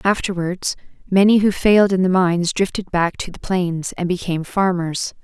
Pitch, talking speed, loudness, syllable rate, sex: 185 Hz, 170 wpm, -18 LUFS, 5.0 syllables/s, female